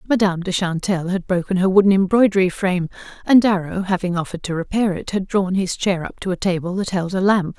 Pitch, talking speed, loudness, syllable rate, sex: 185 Hz, 220 wpm, -19 LUFS, 6.3 syllables/s, female